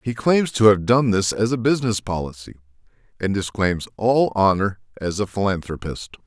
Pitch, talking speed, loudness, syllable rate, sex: 105 Hz, 165 wpm, -20 LUFS, 5.0 syllables/s, male